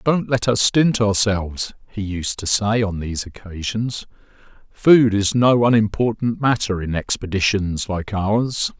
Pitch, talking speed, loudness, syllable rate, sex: 105 Hz, 145 wpm, -19 LUFS, 4.2 syllables/s, male